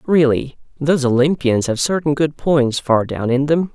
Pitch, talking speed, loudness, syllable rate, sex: 140 Hz, 175 wpm, -17 LUFS, 4.7 syllables/s, male